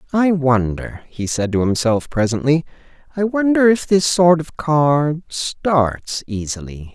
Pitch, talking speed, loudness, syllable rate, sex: 145 Hz, 140 wpm, -17 LUFS, 3.9 syllables/s, male